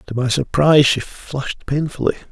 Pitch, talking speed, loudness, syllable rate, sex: 140 Hz, 155 wpm, -18 LUFS, 5.4 syllables/s, male